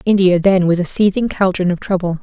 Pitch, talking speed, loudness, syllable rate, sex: 185 Hz, 215 wpm, -15 LUFS, 5.7 syllables/s, female